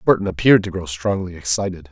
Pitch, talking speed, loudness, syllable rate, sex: 90 Hz, 190 wpm, -19 LUFS, 6.7 syllables/s, male